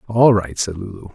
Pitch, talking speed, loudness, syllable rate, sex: 100 Hz, 210 wpm, -17 LUFS, 5.3 syllables/s, male